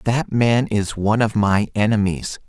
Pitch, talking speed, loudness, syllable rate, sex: 110 Hz, 170 wpm, -19 LUFS, 4.3 syllables/s, male